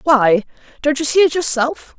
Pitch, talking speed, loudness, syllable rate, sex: 280 Hz, 180 wpm, -16 LUFS, 4.6 syllables/s, female